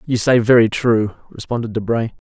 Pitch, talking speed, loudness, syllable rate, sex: 115 Hz, 155 wpm, -17 LUFS, 5.4 syllables/s, male